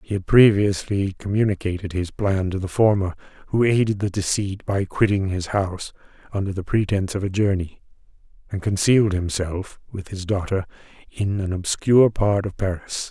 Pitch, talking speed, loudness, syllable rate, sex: 100 Hz, 160 wpm, -22 LUFS, 5.2 syllables/s, male